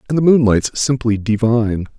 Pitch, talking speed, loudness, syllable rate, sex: 120 Hz, 180 wpm, -15 LUFS, 4.9 syllables/s, male